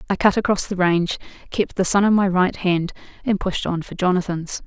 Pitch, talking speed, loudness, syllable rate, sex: 185 Hz, 220 wpm, -20 LUFS, 5.5 syllables/s, female